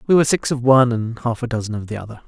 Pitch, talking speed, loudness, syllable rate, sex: 120 Hz, 315 wpm, -18 LUFS, 7.6 syllables/s, male